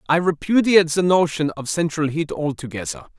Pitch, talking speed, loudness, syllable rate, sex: 155 Hz, 150 wpm, -20 LUFS, 5.5 syllables/s, male